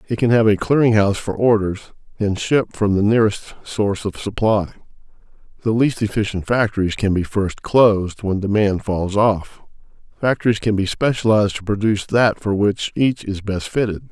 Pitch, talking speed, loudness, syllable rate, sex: 105 Hz, 175 wpm, -18 LUFS, 5.3 syllables/s, male